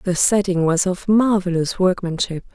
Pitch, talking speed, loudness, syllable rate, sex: 185 Hz, 140 wpm, -19 LUFS, 4.7 syllables/s, female